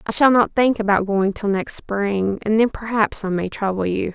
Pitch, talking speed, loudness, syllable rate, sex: 210 Hz, 230 wpm, -19 LUFS, 4.8 syllables/s, female